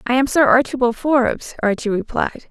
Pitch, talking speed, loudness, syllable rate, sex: 250 Hz, 170 wpm, -18 LUFS, 5.2 syllables/s, female